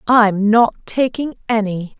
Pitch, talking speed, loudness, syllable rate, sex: 220 Hz, 120 wpm, -16 LUFS, 3.6 syllables/s, female